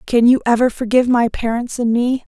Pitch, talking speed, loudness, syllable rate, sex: 240 Hz, 205 wpm, -16 LUFS, 5.7 syllables/s, female